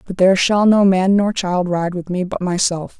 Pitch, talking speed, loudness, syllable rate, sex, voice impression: 185 Hz, 240 wpm, -16 LUFS, 4.8 syllables/s, female, feminine, slightly adult-like, muffled, calm, slightly unique, slightly kind